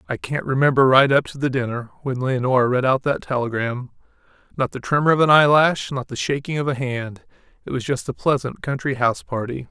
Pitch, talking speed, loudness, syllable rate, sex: 130 Hz, 205 wpm, -20 LUFS, 5.8 syllables/s, male